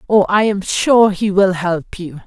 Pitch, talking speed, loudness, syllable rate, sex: 190 Hz, 210 wpm, -14 LUFS, 3.9 syllables/s, female